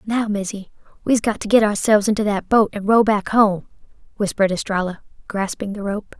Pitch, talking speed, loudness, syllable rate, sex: 205 Hz, 185 wpm, -19 LUFS, 5.6 syllables/s, female